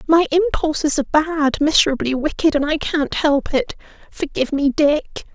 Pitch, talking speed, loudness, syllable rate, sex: 300 Hz, 135 wpm, -18 LUFS, 4.9 syllables/s, female